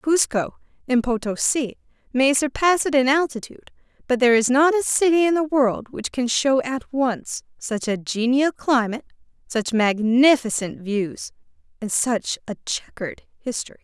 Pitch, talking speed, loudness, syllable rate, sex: 255 Hz, 145 wpm, -21 LUFS, 4.6 syllables/s, female